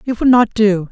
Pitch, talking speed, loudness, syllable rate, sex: 220 Hz, 265 wpm, -13 LUFS, 4.9 syllables/s, female